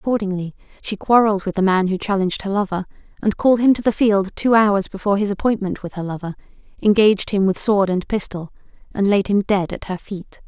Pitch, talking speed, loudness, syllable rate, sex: 200 Hz, 210 wpm, -19 LUFS, 6.0 syllables/s, female